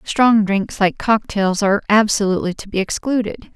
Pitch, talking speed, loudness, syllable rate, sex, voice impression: 205 Hz, 150 wpm, -17 LUFS, 5.0 syllables/s, female, very feminine, young, very thin, tensed, weak, slightly dark, hard, very clear, fluent, very cute, intellectual, very refreshing, sincere, calm, very friendly, very reassuring, very unique, elegant, slightly wild, sweet, lively, kind, slightly intense, slightly sharp